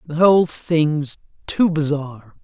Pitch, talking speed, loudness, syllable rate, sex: 155 Hz, 125 wpm, -19 LUFS, 4.2 syllables/s, female